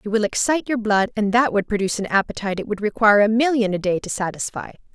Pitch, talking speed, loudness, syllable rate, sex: 210 Hz, 245 wpm, -20 LUFS, 6.9 syllables/s, female